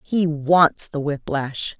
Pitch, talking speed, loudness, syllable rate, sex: 155 Hz, 135 wpm, -20 LUFS, 3.1 syllables/s, female